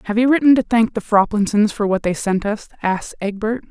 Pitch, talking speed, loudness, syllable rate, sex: 215 Hz, 225 wpm, -18 LUFS, 5.8 syllables/s, female